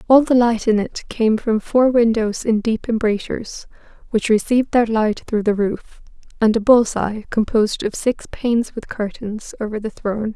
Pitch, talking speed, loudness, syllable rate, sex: 225 Hz, 185 wpm, -19 LUFS, 4.8 syllables/s, female